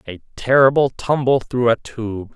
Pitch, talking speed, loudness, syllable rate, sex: 120 Hz, 155 wpm, -17 LUFS, 4.5 syllables/s, male